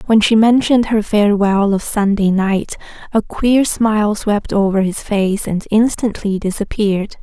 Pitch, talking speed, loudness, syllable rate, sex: 210 Hz, 150 wpm, -15 LUFS, 4.5 syllables/s, female